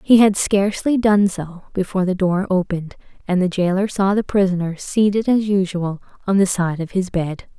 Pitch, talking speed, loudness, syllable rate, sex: 190 Hz, 190 wpm, -19 LUFS, 5.2 syllables/s, female